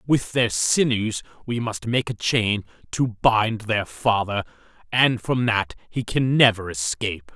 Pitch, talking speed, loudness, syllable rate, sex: 110 Hz, 155 wpm, -22 LUFS, 3.9 syllables/s, male